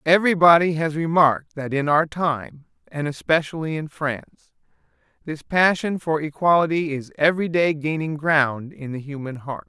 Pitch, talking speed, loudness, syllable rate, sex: 155 Hz, 150 wpm, -21 LUFS, 4.9 syllables/s, male